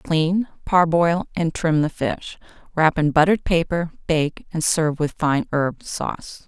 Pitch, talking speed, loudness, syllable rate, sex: 160 Hz, 160 wpm, -21 LUFS, 4.1 syllables/s, female